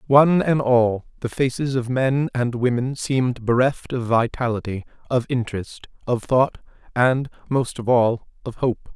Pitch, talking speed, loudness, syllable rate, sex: 125 Hz, 155 wpm, -21 LUFS, 4.5 syllables/s, male